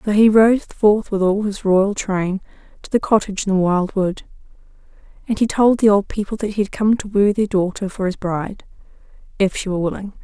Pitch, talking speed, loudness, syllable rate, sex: 200 Hz, 210 wpm, -18 LUFS, 5.5 syllables/s, female